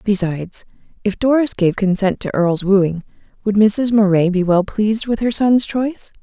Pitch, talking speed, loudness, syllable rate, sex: 205 Hz, 175 wpm, -17 LUFS, 5.0 syllables/s, female